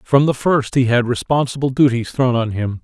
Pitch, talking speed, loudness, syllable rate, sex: 125 Hz, 210 wpm, -17 LUFS, 5.1 syllables/s, male